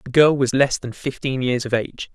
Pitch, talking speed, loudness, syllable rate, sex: 130 Hz, 250 wpm, -20 LUFS, 5.5 syllables/s, male